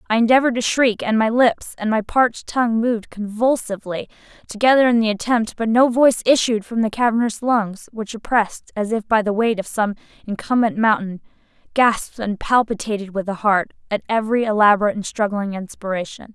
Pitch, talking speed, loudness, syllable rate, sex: 220 Hz, 175 wpm, -19 LUFS, 5.8 syllables/s, female